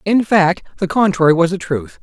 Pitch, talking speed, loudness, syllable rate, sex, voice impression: 180 Hz, 210 wpm, -15 LUFS, 5.3 syllables/s, male, masculine, slightly young, tensed, clear, intellectual, refreshing, calm